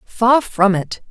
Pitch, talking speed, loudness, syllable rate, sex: 210 Hz, 165 wpm, -16 LUFS, 3.2 syllables/s, female